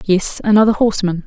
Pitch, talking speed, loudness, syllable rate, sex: 200 Hz, 145 wpm, -15 LUFS, 6.3 syllables/s, female